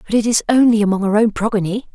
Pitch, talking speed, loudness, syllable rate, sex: 215 Hz, 245 wpm, -16 LUFS, 6.9 syllables/s, female